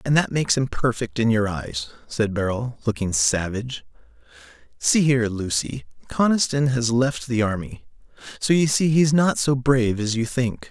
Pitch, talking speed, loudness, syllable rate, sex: 120 Hz, 170 wpm, -22 LUFS, 5.0 syllables/s, male